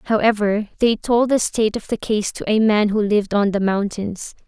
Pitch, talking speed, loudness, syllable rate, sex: 210 Hz, 215 wpm, -19 LUFS, 5.0 syllables/s, female